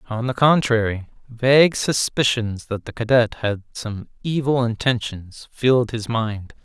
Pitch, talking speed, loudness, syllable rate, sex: 115 Hz, 135 wpm, -20 LUFS, 4.2 syllables/s, male